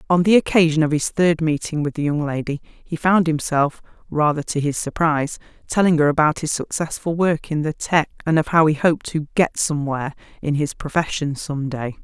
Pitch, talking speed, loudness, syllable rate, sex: 155 Hz, 200 wpm, -20 LUFS, 5.4 syllables/s, female